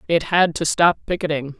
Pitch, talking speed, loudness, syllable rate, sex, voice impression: 165 Hz, 190 wpm, -19 LUFS, 5.2 syllables/s, female, feminine, slightly gender-neutral, slightly thin, tensed, slightly powerful, slightly dark, slightly hard, clear, slightly fluent, slightly cool, intellectual, refreshing, slightly sincere, calm, slightly friendly, slightly reassuring, very unique, slightly elegant, slightly wild, slightly sweet, lively, strict, slightly intense, sharp, light